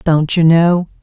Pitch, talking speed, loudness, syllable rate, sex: 165 Hz, 175 wpm, -12 LUFS, 3.7 syllables/s, female